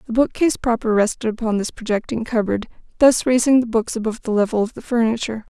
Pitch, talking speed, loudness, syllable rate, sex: 225 Hz, 195 wpm, -19 LUFS, 6.6 syllables/s, female